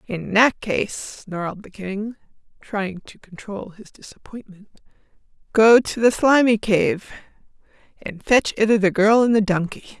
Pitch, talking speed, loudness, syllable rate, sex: 210 Hz, 145 wpm, -19 LUFS, 4.2 syllables/s, female